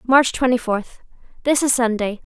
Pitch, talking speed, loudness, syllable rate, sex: 245 Hz, 130 wpm, -19 LUFS, 4.6 syllables/s, female